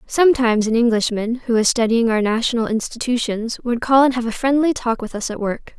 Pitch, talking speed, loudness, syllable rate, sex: 235 Hz, 205 wpm, -18 LUFS, 5.7 syllables/s, female